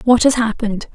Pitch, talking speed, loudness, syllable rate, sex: 230 Hz, 190 wpm, -16 LUFS, 6.0 syllables/s, female